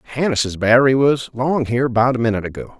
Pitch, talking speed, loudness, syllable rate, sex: 125 Hz, 195 wpm, -17 LUFS, 6.5 syllables/s, male